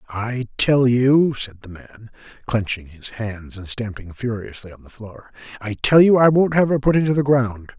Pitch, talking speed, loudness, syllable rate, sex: 120 Hz, 195 wpm, -19 LUFS, 4.7 syllables/s, male